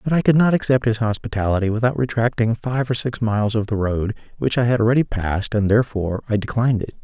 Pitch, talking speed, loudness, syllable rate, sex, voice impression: 115 Hz, 220 wpm, -20 LUFS, 6.5 syllables/s, male, masculine, adult-like, tensed, soft, clear, fluent, cool, intellectual, refreshing, calm, friendly, reassuring, kind, modest